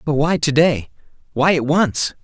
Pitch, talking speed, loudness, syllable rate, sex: 150 Hz, 190 wpm, -17 LUFS, 4.3 syllables/s, male